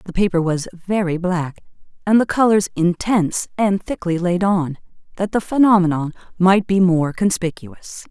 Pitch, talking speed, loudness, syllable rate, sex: 185 Hz, 150 wpm, -18 LUFS, 4.7 syllables/s, female